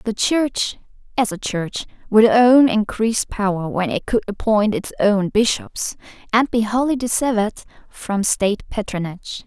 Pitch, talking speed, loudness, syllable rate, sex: 220 Hz, 145 wpm, -19 LUFS, 4.6 syllables/s, female